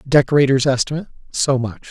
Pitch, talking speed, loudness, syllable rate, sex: 135 Hz, 125 wpm, -17 LUFS, 6.5 syllables/s, male